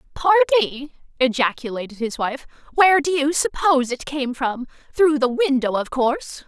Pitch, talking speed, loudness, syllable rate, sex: 280 Hz, 150 wpm, -20 LUFS, 5.4 syllables/s, female